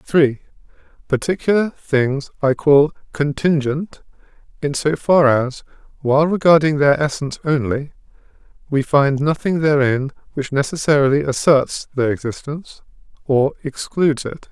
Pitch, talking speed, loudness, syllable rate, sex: 145 Hz, 110 wpm, -18 LUFS, 4.6 syllables/s, male